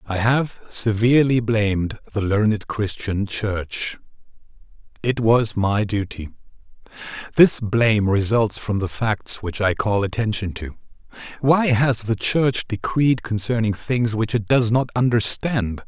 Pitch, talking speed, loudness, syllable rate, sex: 110 Hz, 130 wpm, -20 LUFS, 4.0 syllables/s, male